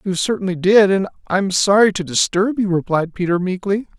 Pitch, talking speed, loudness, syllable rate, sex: 190 Hz, 180 wpm, -17 LUFS, 5.2 syllables/s, male